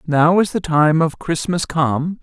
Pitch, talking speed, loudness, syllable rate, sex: 160 Hz, 190 wpm, -17 LUFS, 3.8 syllables/s, male